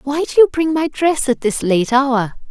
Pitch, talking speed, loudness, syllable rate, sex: 270 Hz, 240 wpm, -16 LUFS, 4.4 syllables/s, female